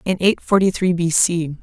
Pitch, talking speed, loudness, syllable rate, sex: 175 Hz, 220 wpm, -17 LUFS, 4.7 syllables/s, female